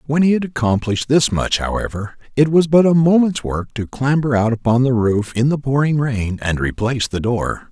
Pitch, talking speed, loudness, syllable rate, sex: 130 Hz, 210 wpm, -17 LUFS, 5.2 syllables/s, male